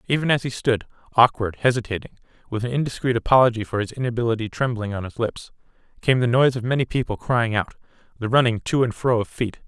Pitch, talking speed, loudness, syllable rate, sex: 120 Hz, 200 wpm, -22 LUFS, 6.4 syllables/s, male